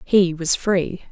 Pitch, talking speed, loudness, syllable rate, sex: 180 Hz, 160 wpm, -19 LUFS, 3.1 syllables/s, female